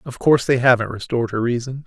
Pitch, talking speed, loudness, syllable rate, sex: 125 Hz, 225 wpm, -19 LUFS, 6.8 syllables/s, male